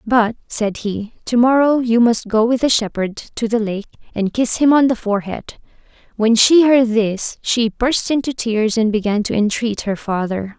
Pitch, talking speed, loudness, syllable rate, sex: 225 Hz, 195 wpm, -17 LUFS, 4.5 syllables/s, female